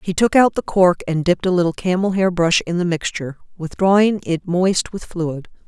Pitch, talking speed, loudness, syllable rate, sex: 180 Hz, 210 wpm, -18 LUFS, 5.2 syllables/s, female